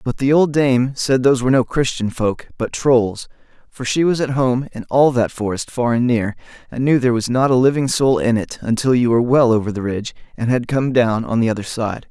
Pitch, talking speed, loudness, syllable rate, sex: 125 Hz, 245 wpm, -17 LUFS, 5.6 syllables/s, male